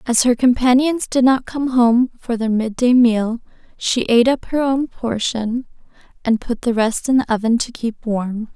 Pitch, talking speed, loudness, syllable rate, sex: 240 Hz, 195 wpm, -17 LUFS, 4.5 syllables/s, female